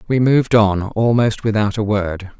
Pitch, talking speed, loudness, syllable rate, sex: 110 Hz, 175 wpm, -16 LUFS, 4.7 syllables/s, male